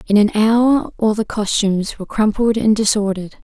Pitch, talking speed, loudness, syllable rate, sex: 210 Hz, 170 wpm, -16 LUFS, 5.4 syllables/s, female